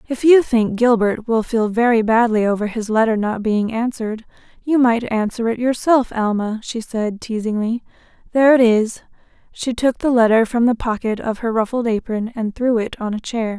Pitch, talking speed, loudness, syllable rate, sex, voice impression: 230 Hz, 185 wpm, -18 LUFS, 5.0 syllables/s, female, feminine, adult-like, tensed, slightly weak, soft, clear, fluent, slightly raspy, intellectual, calm, reassuring, elegant, kind, modest